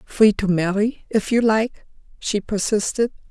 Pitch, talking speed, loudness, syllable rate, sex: 210 Hz, 145 wpm, -20 LUFS, 4.1 syllables/s, female